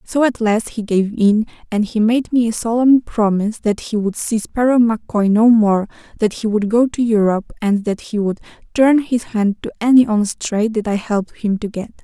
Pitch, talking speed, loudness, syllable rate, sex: 220 Hz, 220 wpm, -17 LUFS, 5.1 syllables/s, female